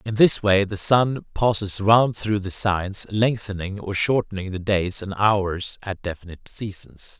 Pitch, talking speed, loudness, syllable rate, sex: 100 Hz, 165 wpm, -22 LUFS, 4.2 syllables/s, male